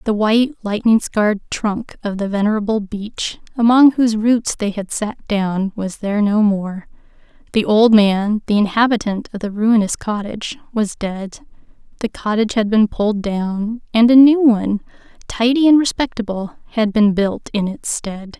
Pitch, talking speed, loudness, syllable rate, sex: 215 Hz, 165 wpm, -17 LUFS, 4.7 syllables/s, female